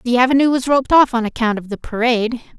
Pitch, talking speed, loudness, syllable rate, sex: 245 Hz, 230 wpm, -16 LUFS, 6.8 syllables/s, female